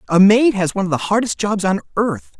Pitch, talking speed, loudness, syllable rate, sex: 195 Hz, 250 wpm, -17 LUFS, 6.0 syllables/s, male